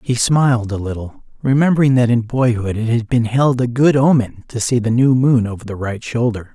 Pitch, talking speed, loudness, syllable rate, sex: 120 Hz, 220 wpm, -16 LUFS, 5.3 syllables/s, male